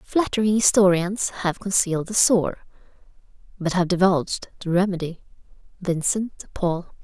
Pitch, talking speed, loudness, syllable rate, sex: 185 Hz, 120 wpm, -22 LUFS, 4.8 syllables/s, female